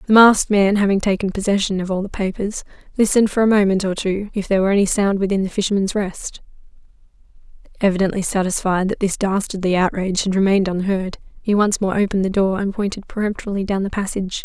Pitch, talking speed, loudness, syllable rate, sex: 195 Hz, 190 wpm, -19 LUFS, 6.7 syllables/s, female